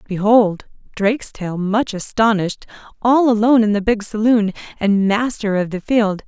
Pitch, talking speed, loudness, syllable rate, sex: 215 Hz, 145 wpm, -17 LUFS, 4.8 syllables/s, female